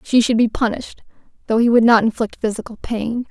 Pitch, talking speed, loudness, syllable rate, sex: 230 Hz, 200 wpm, -17 LUFS, 5.9 syllables/s, female